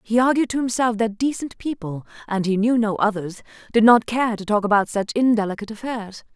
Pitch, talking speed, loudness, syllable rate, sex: 220 Hz, 180 wpm, -21 LUFS, 5.7 syllables/s, female